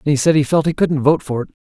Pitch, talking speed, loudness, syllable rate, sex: 150 Hz, 365 wpm, -16 LUFS, 7.1 syllables/s, male